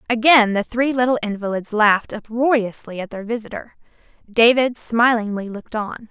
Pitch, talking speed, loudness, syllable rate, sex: 225 Hz, 140 wpm, -19 LUFS, 5.2 syllables/s, female